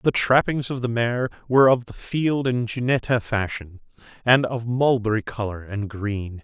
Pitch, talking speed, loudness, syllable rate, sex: 115 Hz, 170 wpm, -22 LUFS, 4.6 syllables/s, male